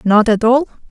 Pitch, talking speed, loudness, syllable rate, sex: 235 Hz, 200 wpm, -13 LUFS, 4.9 syllables/s, female